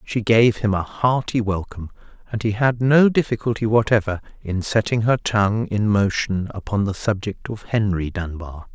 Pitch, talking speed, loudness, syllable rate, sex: 105 Hz, 165 wpm, -20 LUFS, 4.9 syllables/s, male